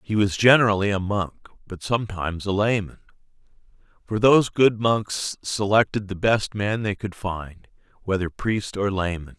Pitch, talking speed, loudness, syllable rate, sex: 100 Hz, 155 wpm, -22 LUFS, 4.7 syllables/s, male